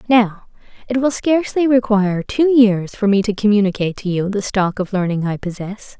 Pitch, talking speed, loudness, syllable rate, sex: 210 Hz, 190 wpm, -17 LUFS, 5.3 syllables/s, female